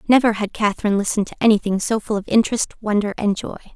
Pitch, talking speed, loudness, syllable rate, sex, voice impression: 210 Hz, 210 wpm, -19 LUFS, 7.3 syllables/s, female, very feminine, very young, very thin, tensed, slightly powerful, very bright, hard, very clear, halting, very cute, intellectual, refreshing, very sincere, slightly calm, very friendly, reassuring, very unique, slightly elegant, wild, slightly sweet, lively, slightly strict, intense, slightly sharp